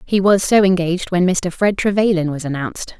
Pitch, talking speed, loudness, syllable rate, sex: 180 Hz, 200 wpm, -17 LUFS, 5.6 syllables/s, female